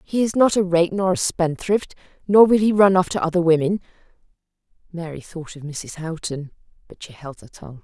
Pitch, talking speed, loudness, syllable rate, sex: 175 Hz, 190 wpm, -19 LUFS, 5.4 syllables/s, female